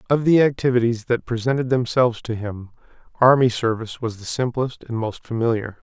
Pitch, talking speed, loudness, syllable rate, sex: 120 Hz, 160 wpm, -21 LUFS, 5.7 syllables/s, male